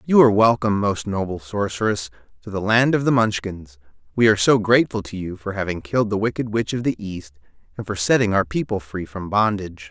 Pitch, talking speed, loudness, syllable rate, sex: 100 Hz, 210 wpm, -20 LUFS, 6.0 syllables/s, male